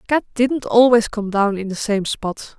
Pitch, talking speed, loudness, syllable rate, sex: 220 Hz, 210 wpm, -18 LUFS, 4.3 syllables/s, female